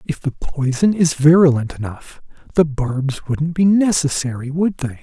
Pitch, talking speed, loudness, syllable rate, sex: 150 Hz, 155 wpm, -17 LUFS, 4.4 syllables/s, male